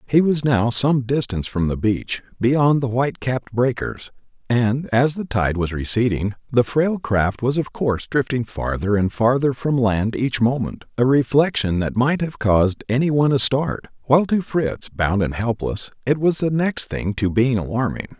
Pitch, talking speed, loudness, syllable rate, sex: 125 Hz, 190 wpm, -20 LUFS, 4.7 syllables/s, male